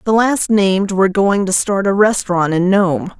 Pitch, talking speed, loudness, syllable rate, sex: 195 Hz, 205 wpm, -14 LUFS, 4.9 syllables/s, female